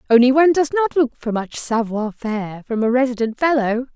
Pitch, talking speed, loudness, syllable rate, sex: 250 Hz, 195 wpm, -19 LUFS, 5.5 syllables/s, female